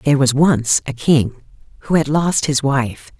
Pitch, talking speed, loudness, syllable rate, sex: 140 Hz, 190 wpm, -16 LUFS, 4.5 syllables/s, female